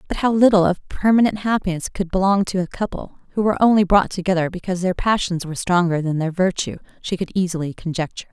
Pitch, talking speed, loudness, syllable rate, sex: 185 Hz, 200 wpm, -20 LUFS, 6.6 syllables/s, female